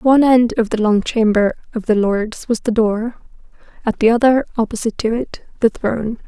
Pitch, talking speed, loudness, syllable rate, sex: 225 Hz, 200 wpm, -17 LUFS, 5.5 syllables/s, female